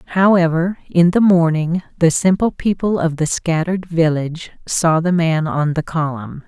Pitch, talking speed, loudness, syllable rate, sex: 170 Hz, 160 wpm, -16 LUFS, 4.7 syllables/s, female